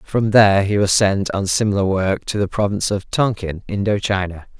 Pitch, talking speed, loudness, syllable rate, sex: 100 Hz, 195 wpm, -18 LUFS, 5.2 syllables/s, male